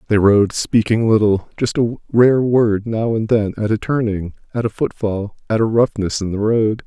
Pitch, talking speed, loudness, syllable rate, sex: 110 Hz, 200 wpm, -17 LUFS, 4.6 syllables/s, male